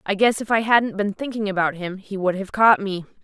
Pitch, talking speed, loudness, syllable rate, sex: 205 Hz, 260 wpm, -21 LUFS, 5.4 syllables/s, female